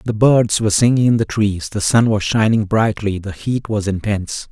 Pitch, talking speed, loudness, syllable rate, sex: 105 Hz, 215 wpm, -16 LUFS, 5.0 syllables/s, male